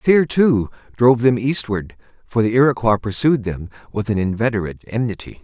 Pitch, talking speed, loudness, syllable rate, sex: 115 Hz, 155 wpm, -18 LUFS, 5.4 syllables/s, male